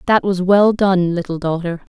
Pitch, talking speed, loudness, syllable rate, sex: 185 Hz, 185 wpm, -16 LUFS, 4.7 syllables/s, female